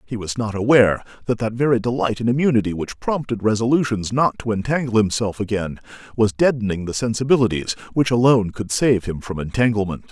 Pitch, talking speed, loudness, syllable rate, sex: 115 Hz, 170 wpm, -20 LUFS, 6.0 syllables/s, male